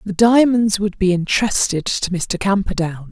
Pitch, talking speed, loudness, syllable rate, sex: 195 Hz, 155 wpm, -17 LUFS, 4.3 syllables/s, female